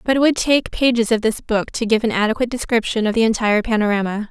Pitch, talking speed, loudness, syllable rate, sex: 225 Hz, 235 wpm, -18 LUFS, 6.7 syllables/s, female